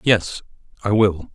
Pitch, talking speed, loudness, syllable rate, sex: 100 Hz, 135 wpm, -19 LUFS, 3.8 syllables/s, male